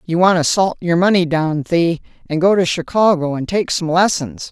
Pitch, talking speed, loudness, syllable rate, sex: 170 Hz, 210 wpm, -16 LUFS, 4.9 syllables/s, female